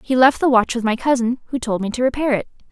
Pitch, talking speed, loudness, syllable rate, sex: 245 Hz, 290 wpm, -18 LUFS, 6.5 syllables/s, female